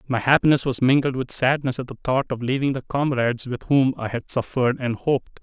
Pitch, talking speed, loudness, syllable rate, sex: 130 Hz, 220 wpm, -22 LUFS, 5.8 syllables/s, male